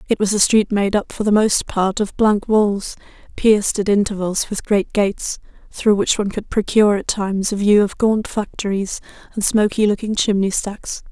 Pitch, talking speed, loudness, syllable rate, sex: 205 Hz, 195 wpm, -18 LUFS, 5.0 syllables/s, female